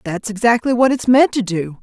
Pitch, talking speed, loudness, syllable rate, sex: 220 Hz, 230 wpm, -16 LUFS, 5.3 syllables/s, female